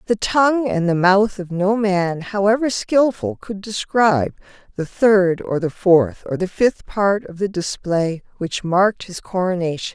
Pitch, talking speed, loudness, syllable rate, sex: 190 Hz, 170 wpm, -18 LUFS, 4.2 syllables/s, female